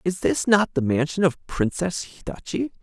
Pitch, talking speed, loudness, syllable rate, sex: 155 Hz, 190 wpm, -23 LUFS, 5.2 syllables/s, male